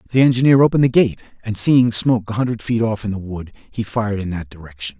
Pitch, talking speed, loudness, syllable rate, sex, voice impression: 110 Hz, 240 wpm, -18 LUFS, 6.6 syllables/s, male, masculine, middle-aged, slightly relaxed, slightly powerful, slightly hard, fluent, slightly raspy, cool, calm, slightly mature, slightly reassuring, wild, slightly strict, slightly modest